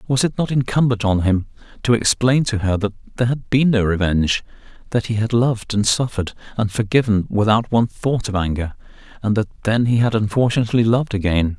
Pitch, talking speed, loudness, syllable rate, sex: 110 Hz, 185 wpm, -19 LUFS, 6.1 syllables/s, male